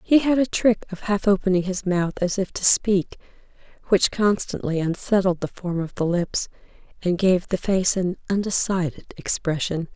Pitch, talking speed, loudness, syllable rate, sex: 190 Hz, 170 wpm, -22 LUFS, 4.8 syllables/s, female